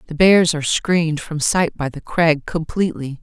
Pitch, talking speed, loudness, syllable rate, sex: 160 Hz, 185 wpm, -18 LUFS, 5.0 syllables/s, female